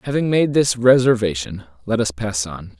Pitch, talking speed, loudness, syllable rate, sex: 110 Hz, 170 wpm, -18 LUFS, 4.9 syllables/s, male